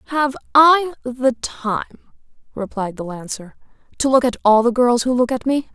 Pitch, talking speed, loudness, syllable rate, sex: 245 Hz, 180 wpm, -18 LUFS, 4.8 syllables/s, female